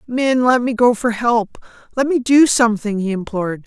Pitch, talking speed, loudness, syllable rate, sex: 230 Hz, 180 wpm, -16 LUFS, 5.1 syllables/s, female